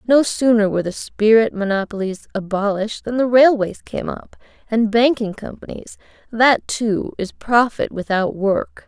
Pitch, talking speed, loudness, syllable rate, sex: 220 Hz, 140 wpm, -18 LUFS, 4.5 syllables/s, female